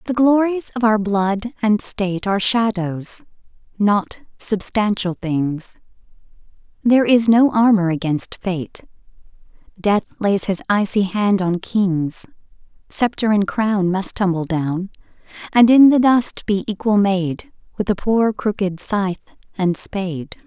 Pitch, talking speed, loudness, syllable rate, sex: 200 Hz, 130 wpm, -18 LUFS, 3.9 syllables/s, female